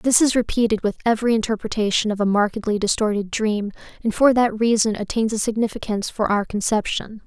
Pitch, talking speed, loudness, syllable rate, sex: 215 Hz, 175 wpm, -20 LUFS, 6.1 syllables/s, female